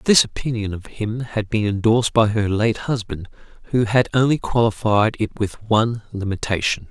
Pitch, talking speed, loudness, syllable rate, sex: 110 Hz, 165 wpm, -20 LUFS, 4.9 syllables/s, male